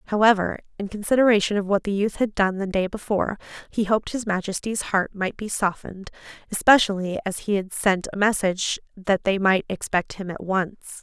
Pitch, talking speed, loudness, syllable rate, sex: 200 Hz, 185 wpm, -23 LUFS, 5.7 syllables/s, female